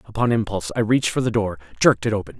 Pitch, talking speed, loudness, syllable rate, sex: 105 Hz, 250 wpm, -21 LUFS, 8.2 syllables/s, male